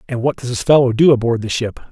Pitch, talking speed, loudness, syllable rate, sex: 125 Hz, 285 wpm, -15 LUFS, 6.6 syllables/s, male